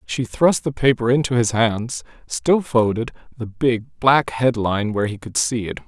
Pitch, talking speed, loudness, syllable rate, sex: 120 Hz, 185 wpm, -19 LUFS, 4.7 syllables/s, male